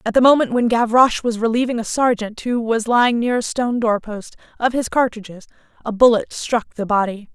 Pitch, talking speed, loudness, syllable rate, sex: 230 Hz, 205 wpm, -18 LUFS, 5.6 syllables/s, female